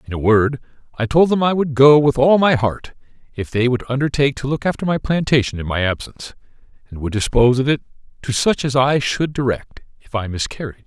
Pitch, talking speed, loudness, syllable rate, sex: 130 Hz, 215 wpm, -17 LUFS, 5.8 syllables/s, male